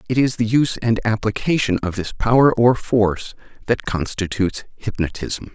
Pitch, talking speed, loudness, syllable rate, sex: 110 Hz, 150 wpm, -19 LUFS, 5.1 syllables/s, male